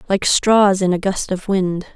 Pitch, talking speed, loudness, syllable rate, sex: 190 Hz, 215 wpm, -17 LUFS, 4.2 syllables/s, female